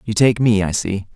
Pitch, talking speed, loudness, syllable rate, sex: 105 Hz, 260 wpm, -17 LUFS, 5.0 syllables/s, male